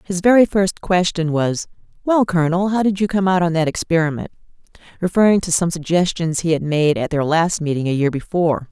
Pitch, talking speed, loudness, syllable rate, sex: 170 Hz, 195 wpm, -18 LUFS, 5.7 syllables/s, female